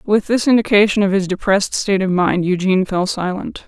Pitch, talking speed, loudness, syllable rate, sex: 195 Hz, 195 wpm, -16 LUFS, 5.9 syllables/s, female